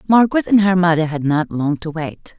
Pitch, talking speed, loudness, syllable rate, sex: 175 Hz, 225 wpm, -17 LUFS, 5.4 syllables/s, female